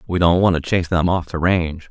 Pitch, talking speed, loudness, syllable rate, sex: 85 Hz, 285 wpm, -18 LUFS, 6.3 syllables/s, male